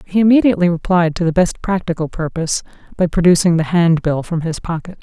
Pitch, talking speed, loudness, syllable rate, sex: 170 Hz, 180 wpm, -16 LUFS, 6.1 syllables/s, female